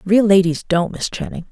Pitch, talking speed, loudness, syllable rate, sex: 190 Hz, 195 wpm, -17 LUFS, 5.2 syllables/s, female